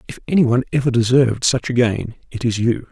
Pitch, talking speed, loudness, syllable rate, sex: 120 Hz, 205 wpm, -18 LUFS, 6.3 syllables/s, male